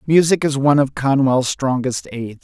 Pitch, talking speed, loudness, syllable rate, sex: 135 Hz, 175 wpm, -17 LUFS, 4.8 syllables/s, male